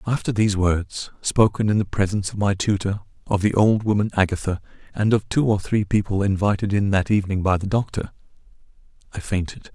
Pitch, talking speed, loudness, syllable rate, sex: 100 Hz, 185 wpm, -21 LUFS, 5.8 syllables/s, male